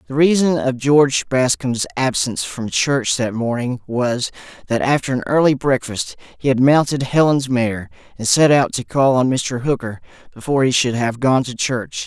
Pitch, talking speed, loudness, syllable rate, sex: 130 Hz, 180 wpm, -17 LUFS, 4.8 syllables/s, male